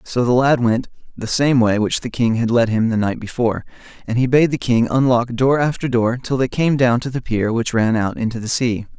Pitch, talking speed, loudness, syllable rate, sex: 120 Hz, 255 wpm, -18 LUFS, 5.4 syllables/s, male